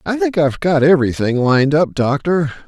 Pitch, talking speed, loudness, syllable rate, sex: 155 Hz, 180 wpm, -15 LUFS, 5.8 syllables/s, female